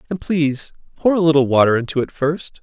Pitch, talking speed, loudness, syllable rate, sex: 150 Hz, 205 wpm, -17 LUFS, 5.9 syllables/s, male